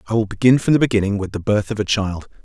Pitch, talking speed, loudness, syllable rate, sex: 105 Hz, 295 wpm, -18 LUFS, 6.8 syllables/s, male